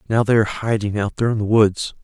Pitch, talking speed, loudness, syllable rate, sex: 110 Hz, 265 wpm, -19 LUFS, 6.7 syllables/s, male